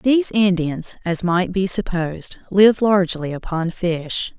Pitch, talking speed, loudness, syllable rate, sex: 185 Hz, 135 wpm, -19 LUFS, 4.1 syllables/s, female